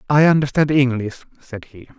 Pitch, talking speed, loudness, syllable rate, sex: 135 Hz, 150 wpm, -16 LUFS, 5.4 syllables/s, male